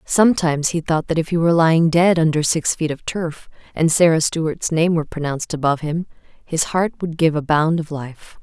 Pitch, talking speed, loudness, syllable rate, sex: 160 Hz, 215 wpm, -18 LUFS, 5.5 syllables/s, female